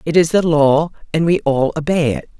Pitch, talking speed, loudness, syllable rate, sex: 155 Hz, 225 wpm, -16 LUFS, 5.2 syllables/s, female